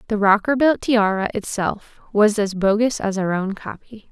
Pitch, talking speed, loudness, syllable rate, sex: 210 Hz, 160 wpm, -19 LUFS, 4.6 syllables/s, female